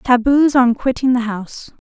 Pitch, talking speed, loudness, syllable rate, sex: 250 Hz, 160 wpm, -15 LUFS, 4.9 syllables/s, female